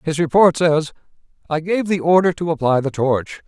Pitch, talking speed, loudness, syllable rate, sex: 160 Hz, 190 wpm, -17 LUFS, 5.1 syllables/s, male